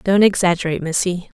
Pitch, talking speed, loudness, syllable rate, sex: 180 Hz, 130 wpm, -18 LUFS, 6.2 syllables/s, female